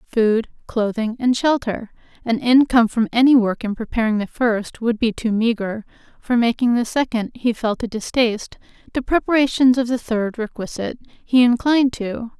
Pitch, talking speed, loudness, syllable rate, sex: 235 Hz, 165 wpm, -19 LUFS, 5.0 syllables/s, female